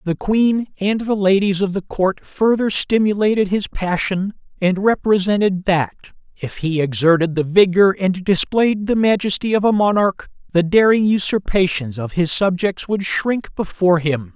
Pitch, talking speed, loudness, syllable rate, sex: 190 Hz, 155 wpm, -17 LUFS, 4.5 syllables/s, male